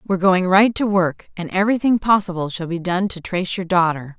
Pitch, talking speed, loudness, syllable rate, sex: 185 Hz, 215 wpm, -19 LUFS, 5.7 syllables/s, female